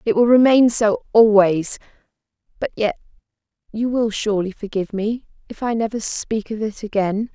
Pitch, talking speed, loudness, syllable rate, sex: 215 Hz, 155 wpm, -19 LUFS, 5.0 syllables/s, female